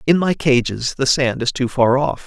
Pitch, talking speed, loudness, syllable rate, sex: 135 Hz, 240 wpm, -17 LUFS, 4.8 syllables/s, male